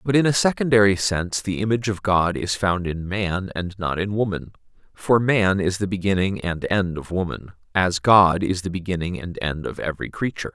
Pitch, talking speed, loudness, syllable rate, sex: 95 Hz, 205 wpm, -22 LUFS, 5.3 syllables/s, male